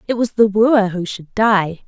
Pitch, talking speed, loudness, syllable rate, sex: 205 Hz, 225 wpm, -16 LUFS, 4.1 syllables/s, female